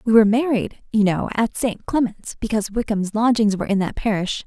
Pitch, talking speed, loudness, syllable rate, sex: 215 Hz, 200 wpm, -20 LUFS, 5.8 syllables/s, female